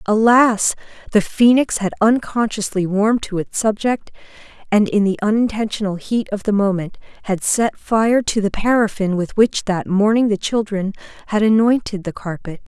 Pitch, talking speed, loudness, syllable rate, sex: 210 Hz, 155 wpm, -18 LUFS, 4.8 syllables/s, female